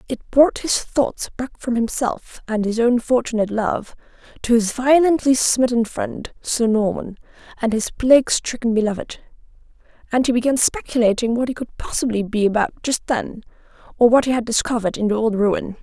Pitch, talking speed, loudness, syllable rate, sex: 235 Hz, 170 wpm, -19 LUFS, 5.2 syllables/s, female